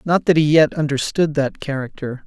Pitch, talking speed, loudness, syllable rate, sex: 145 Hz, 185 wpm, -18 LUFS, 5.1 syllables/s, male